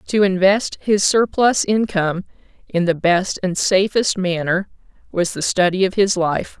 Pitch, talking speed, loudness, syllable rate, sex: 190 Hz, 155 wpm, -18 LUFS, 4.3 syllables/s, female